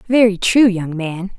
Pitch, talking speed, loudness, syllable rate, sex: 200 Hz, 175 wpm, -15 LUFS, 4.2 syllables/s, female